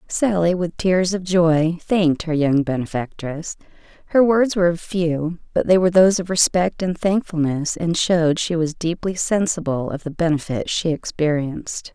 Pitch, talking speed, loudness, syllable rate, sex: 170 Hz, 160 wpm, -20 LUFS, 4.7 syllables/s, female